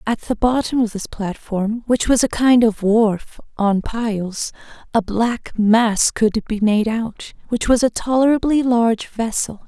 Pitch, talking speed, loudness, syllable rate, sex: 225 Hz, 165 wpm, -18 LUFS, 4.1 syllables/s, female